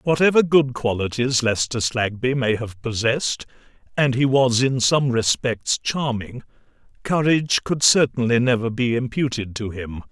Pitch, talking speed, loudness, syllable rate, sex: 125 Hz, 135 wpm, -20 LUFS, 4.6 syllables/s, male